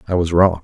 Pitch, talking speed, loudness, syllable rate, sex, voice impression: 85 Hz, 285 wpm, -16 LUFS, 6.4 syllables/s, male, very masculine, adult-like, thick, cool, sincere, slightly calm, sweet